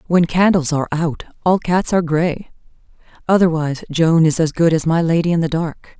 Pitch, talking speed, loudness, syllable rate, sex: 165 Hz, 190 wpm, -17 LUFS, 5.4 syllables/s, female